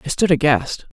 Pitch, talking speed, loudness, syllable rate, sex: 150 Hz, 190 wpm, -17 LUFS, 5.2 syllables/s, female